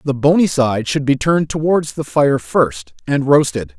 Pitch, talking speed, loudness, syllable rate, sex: 130 Hz, 190 wpm, -16 LUFS, 4.5 syllables/s, male